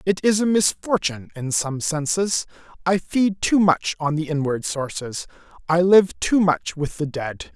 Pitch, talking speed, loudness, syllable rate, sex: 170 Hz, 175 wpm, -21 LUFS, 4.3 syllables/s, male